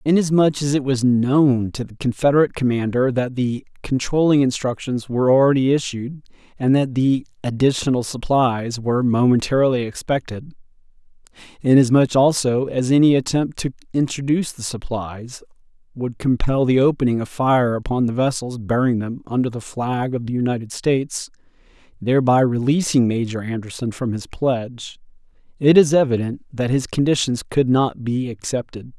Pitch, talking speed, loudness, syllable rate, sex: 130 Hz, 135 wpm, -19 LUFS, 5.1 syllables/s, male